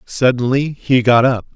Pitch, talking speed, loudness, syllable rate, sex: 125 Hz, 155 wpm, -15 LUFS, 4.3 syllables/s, male